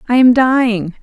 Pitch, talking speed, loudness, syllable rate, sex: 240 Hz, 175 wpm, -12 LUFS, 5.1 syllables/s, female